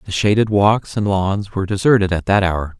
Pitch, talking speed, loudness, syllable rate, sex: 100 Hz, 215 wpm, -17 LUFS, 5.3 syllables/s, male